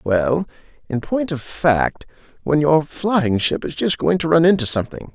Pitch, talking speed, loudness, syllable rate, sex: 150 Hz, 185 wpm, -18 LUFS, 4.5 syllables/s, male